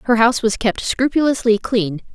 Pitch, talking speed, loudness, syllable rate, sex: 230 Hz, 170 wpm, -17 LUFS, 5.0 syllables/s, female